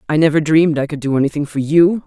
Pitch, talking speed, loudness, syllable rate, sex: 150 Hz, 260 wpm, -15 LUFS, 6.9 syllables/s, female